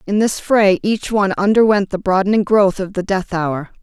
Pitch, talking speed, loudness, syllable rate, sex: 195 Hz, 205 wpm, -16 LUFS, 5.0 syllables/s, female